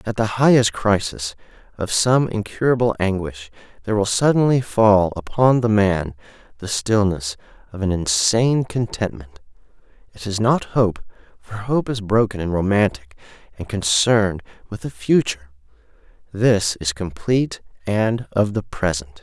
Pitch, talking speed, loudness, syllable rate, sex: 105 Hz, 135 wpm, -19 LUFS, 4.6 syllables/s, male